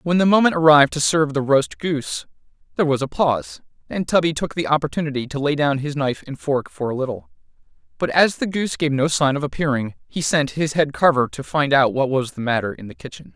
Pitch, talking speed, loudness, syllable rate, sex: 145 Hz, 235 wpm, -20 LUFS, 6.2 syllables/s, male